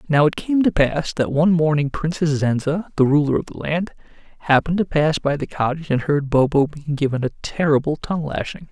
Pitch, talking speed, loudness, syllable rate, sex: 150 Hz, 205 wpm, -20 LUFS, 5.7 syllables/s, male